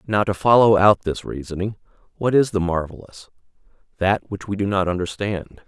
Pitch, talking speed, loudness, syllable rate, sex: 100 Hz, 160 wpm, -20 LUFS, 5.4 syllables/s, male